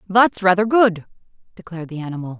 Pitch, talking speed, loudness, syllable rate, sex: 185 Hz, 150 wpm, -17 LUFS, 6.2 syllables/s, female